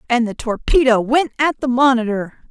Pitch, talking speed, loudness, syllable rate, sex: 245 Hz, 170 wpm, -17 LUFS, 5.0 syllables/s, female